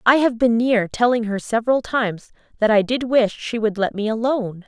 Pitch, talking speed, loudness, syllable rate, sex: 225 Hz, 220 wpm, -19 LUFS, 5.4 syllables/s, female